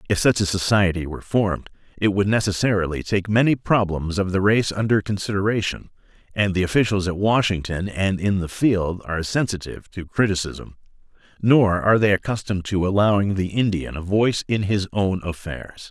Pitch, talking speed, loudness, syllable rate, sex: 100 Hz, 165 wpm, -21 LUFS, 5.5 syllables/s, male